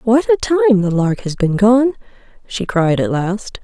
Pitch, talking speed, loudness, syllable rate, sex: 215 Hz, 200 wpm, -15 LUFS, 4.2 syllables/s, female